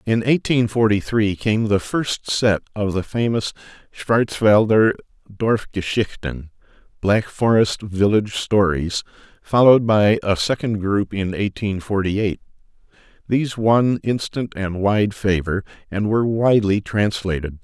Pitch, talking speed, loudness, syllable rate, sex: 105 Hz, 120 wpm, -19 LUFS, 3.9 syllables/s, male